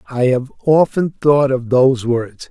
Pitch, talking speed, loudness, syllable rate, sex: 135 Hz, 170 wpm, -15 LUFS, 4.3 syllables/s, male